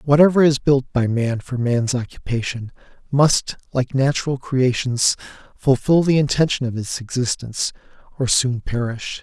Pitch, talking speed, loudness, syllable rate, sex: 130 Hz, 135 wpm, -19 LUFS, 4.7 syllables/s, male